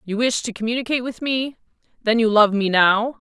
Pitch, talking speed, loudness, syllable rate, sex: 230 Hz, 185 wpm, -19 LUFS, 5.7 syllables/s, female